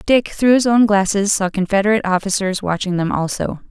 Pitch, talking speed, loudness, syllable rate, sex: 200 Hz, 180 wpm, -17 LUFS, 5.7 syllables/s, female